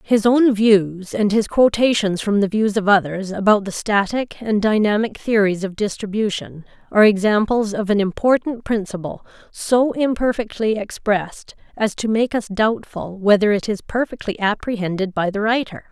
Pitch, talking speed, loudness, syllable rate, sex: 210 Hz, 155 wpm, -19 LUFS, 4.8 syllables/s, female